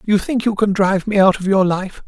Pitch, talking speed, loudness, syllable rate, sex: 195 Hz, 290 wpm, -16 LUFS, 5.6 syllables/s, male